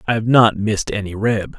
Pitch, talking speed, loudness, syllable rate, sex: 105 Hz, 225 wpm, -17 LUFS, 5.6 syllables/s, male